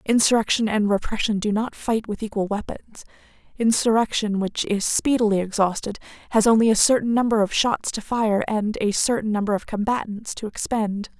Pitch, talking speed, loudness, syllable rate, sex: 215 Hz, 165 wpm, -22 LUFS, 5.3 syllables/s, female